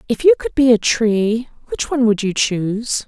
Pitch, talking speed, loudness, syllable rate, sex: 230 Hz, 215 wpm, -17 LUFS, 5.0 syllables/s, female